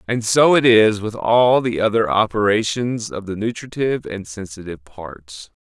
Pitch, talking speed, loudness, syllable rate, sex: 105 Hz, 160 wpm, -17 LUFS, 4.7 syllables/s, male